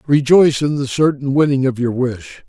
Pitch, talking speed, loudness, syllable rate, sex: 135 Hz, 195 wpm, -15 LUFS, 5.2 syllables/s, male